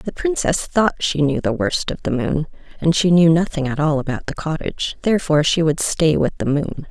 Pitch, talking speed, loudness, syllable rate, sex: 160 Hz, 225 wpm, -19 LUFS, 5.3 syllables/s, female